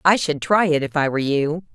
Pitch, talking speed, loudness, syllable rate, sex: 160 Hz, 275 wpm, -20 LUFS, 5.8 syllables/s, female